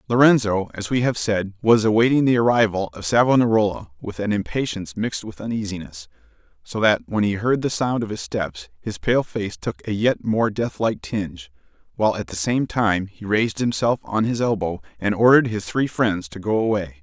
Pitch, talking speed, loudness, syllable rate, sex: 105 Hz, 195 wpm, -21 LUFS, 5.4 syllables/s, male